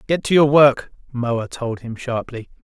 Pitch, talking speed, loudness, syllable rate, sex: 130 Hz, 180 wpm, -18 LUFS, 4.2 syllables/s, male